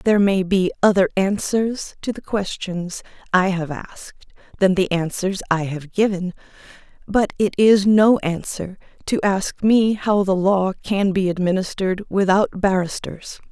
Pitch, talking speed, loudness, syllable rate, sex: 190 Hz, 145 wpm, -19 LUFS, 4.3 syllables/s, female